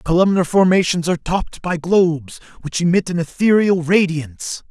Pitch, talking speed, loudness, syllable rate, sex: 175 Hz, 155 wpm, -17 LUFS, 5.5 syllables/s, male